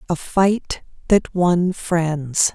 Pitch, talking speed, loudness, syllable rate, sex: 175 Hz, 120 wpm, -19 LUFS, 2.4 syllables/s, female